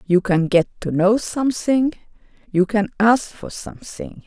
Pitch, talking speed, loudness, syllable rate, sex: 210 Hz, 155 wpm, -19 LUFS, 4.5 syllables/s, female